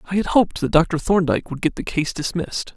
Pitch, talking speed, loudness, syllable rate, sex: 170 Hz, 240 wpm, -20 LUFS, 6.3 syllables/s, male